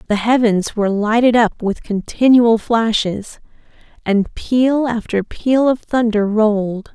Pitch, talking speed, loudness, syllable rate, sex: 225 Hz, 130 wpm, -16 LUFS, 3.9 syllables/s, female